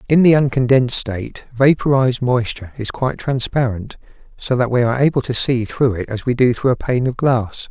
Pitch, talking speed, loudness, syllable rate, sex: 125 Hz, 200 wpm, -17 LUFS, 5.6 syllables/s, male